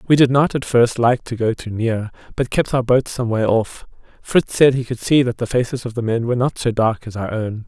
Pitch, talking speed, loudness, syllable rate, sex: 120 Hz, 275 wpm, -18 LUFS, 5.4 syllables/s, male